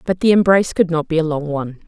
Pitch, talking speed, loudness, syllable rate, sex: 165 Hz, 290 wpm, -17 LUFS, 7.1 syllables/s, female